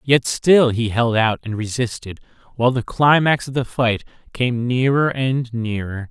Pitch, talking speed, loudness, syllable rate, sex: 120 Hz, 165 wpm, -19 LUFS, 4.3 syllables/s, male